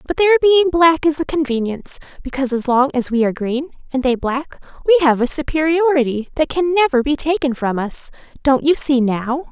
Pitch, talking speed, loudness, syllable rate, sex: 285 Hz, 200 wpm, -17 LUFS, 5.5 syllables/s, female